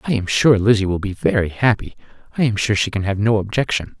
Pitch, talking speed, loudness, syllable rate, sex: 110 Hz, 225 wpm, -18 LUFS, 6.2 syllables/s, male